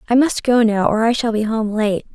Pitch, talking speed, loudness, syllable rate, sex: 225 Hz, 280 wpm, -17 LUFS, 5.3 syllables/s, female